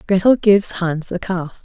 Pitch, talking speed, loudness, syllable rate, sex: 185 Hz, 185 wpm, -17 LUFS, 4.8 syllables/s, female